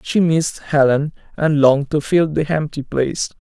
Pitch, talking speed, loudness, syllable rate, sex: 150 Hz, 175 wpm, -17 LUFS, 5.0 syllables/s, male